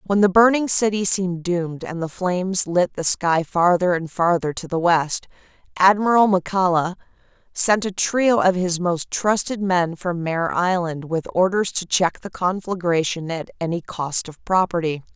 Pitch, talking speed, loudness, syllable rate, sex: 180 Hz, 165 wpm, -20 LUFS, 4.6 syllables/s, female